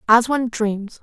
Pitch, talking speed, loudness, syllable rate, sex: 230 Hz, 175 wpm, -19 LUFS, 4.6 syllables/s, female